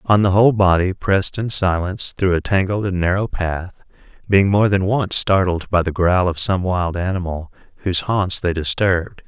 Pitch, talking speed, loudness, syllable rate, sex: 95 Hz, 190 wpm, -18 LUFS, 5.0 syllables/s, male